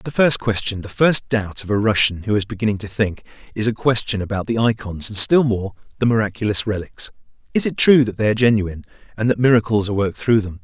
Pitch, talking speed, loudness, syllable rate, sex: 110 Hz, 225 wpm, -18 LUFS, 6.3 syllables/s, male